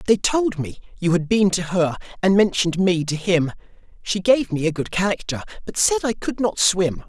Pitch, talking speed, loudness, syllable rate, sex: 185 Hz, 210 wpm, -20 LUFS, 5.0 syllables/s, male